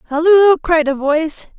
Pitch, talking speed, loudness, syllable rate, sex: 320 Hz, 150 wpm, -13 LUFS, 4.6 syllables/s, female